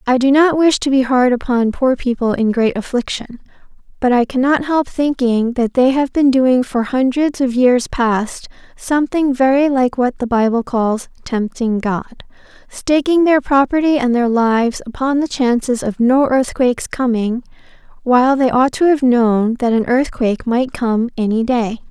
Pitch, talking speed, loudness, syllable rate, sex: 250 Hz, 170 wpm, -15 LUFS, 4.5 syllables/s, female